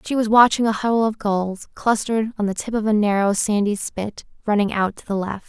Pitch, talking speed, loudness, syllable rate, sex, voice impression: 210 Hz, 230 wpm, -20 LUFS, 5.6 syllables/s, female, very feminine, young, thin, slightly tensed, powerful, slightly dark, soft, slightly clear, fluent, slightly raspy, very cute, intellectual, refreshing, sincere, very calm, very friendly, very reassuring, unique, elegant, slightly wild, sweet, slightly lively, very kind, modest, light